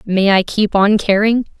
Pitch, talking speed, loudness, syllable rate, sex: 205 Hz, 190 wpm, -14 LUFS, 4.3 syllables/s, female